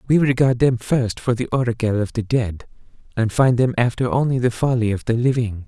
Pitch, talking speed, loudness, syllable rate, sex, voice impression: 120 Hz, 210 wpm, -19 LUFS, 5.5 syllables/s, male, very masculine, very adult-like, middle-aged, thick, slightly tensed, powerful, slightly dark, slightly hard, clear, fluent, slightly raspy, very cool, very intellectual, sincere, very calm, very mature, friendly, reassuring, very unique, elegant, wild, very sweet, lively, very kind, modest